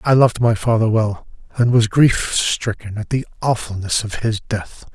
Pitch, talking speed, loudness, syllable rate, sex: 110 Hz, 180 wpm, -18 LUFS, 4.6 syllables/s, male